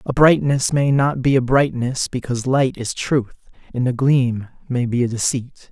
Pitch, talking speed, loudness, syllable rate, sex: 130 Hz, 190 wpm, -19 LUFS, 4.6 syllables/s, male